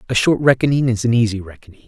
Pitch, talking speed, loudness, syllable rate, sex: 120 Hz, 225 wpm, -16 LUFS, 7.3 syllables/s, male